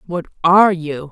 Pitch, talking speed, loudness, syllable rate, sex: 170 Hz, 160 wpm, -14 LUFS, 5.1 syllables/s, female